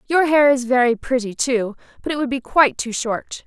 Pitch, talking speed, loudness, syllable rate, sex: 255 Hz, 225 wpm, -19 LUFS, 5.3 syllables/s, female